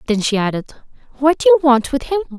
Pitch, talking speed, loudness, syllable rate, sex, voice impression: 265 Hz, 225 wpm, -16 LUFS, 6.7 syllables/s, female, feminine, young, tensed, slightly bright, halting, intellectual, friendly, unique